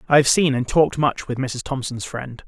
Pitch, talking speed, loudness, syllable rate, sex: 130 Hz, 240 wpm, -20 LUFS, 5.3 syllables/s, male